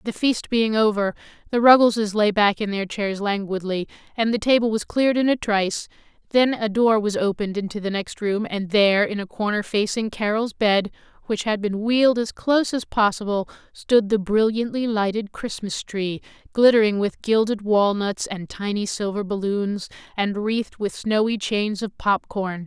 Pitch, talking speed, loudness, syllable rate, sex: 210 Hz, 175 wpm, -22 LUFS, 4.9 syllables/s, female